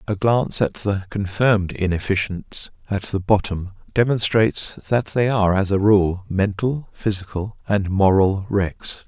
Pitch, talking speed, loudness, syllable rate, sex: 100 Hz, 140 wpm, -20 LUFS, 4.4 syllables/s, male